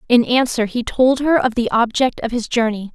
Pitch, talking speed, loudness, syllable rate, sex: 240 Hz, 225 wpm, -17 LUFS, 5.1 syllables/s, female